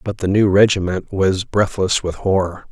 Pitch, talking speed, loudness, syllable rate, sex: 95 Hz, 175 wpm, -17 LUFS, 4.7 syllables/s, male